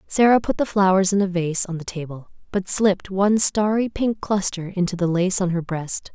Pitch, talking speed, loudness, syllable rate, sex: 190 Hz, 215 wpm, -21 LUFS, 5.2 syllables/s, female